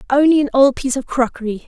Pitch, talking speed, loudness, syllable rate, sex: 260 Hz, 215 wpm, -16 LUFS, 7.0 syllables/s, female